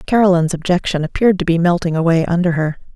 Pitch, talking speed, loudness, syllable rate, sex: 175 Hz, 185 wpm, -16 LUFS, 7.1 syllables/s, female